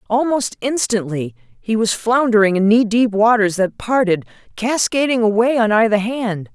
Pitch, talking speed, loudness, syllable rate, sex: 220 Hz, 145 wpm, -16 LUFS, 4.6 syllables/s, female